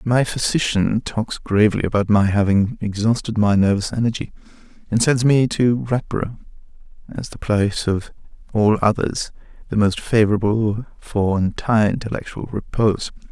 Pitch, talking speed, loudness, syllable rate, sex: 110 Hz, 130 wpm, -19 LUFS, 5.0 syllables/s, male